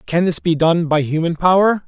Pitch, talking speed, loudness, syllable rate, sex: 170 Hz, 225 wpm, -16 LUFS, 4.9 syllables/s, male